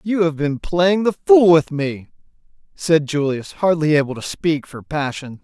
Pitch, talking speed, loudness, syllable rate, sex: 155 Hz, 175 wpm, -18 LUFS, 4.3 syllables/s, male